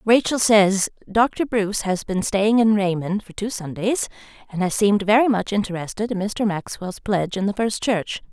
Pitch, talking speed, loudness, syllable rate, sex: 205 Hz, 190 wpm, -21 LUFS, 4.9 syllables/s, female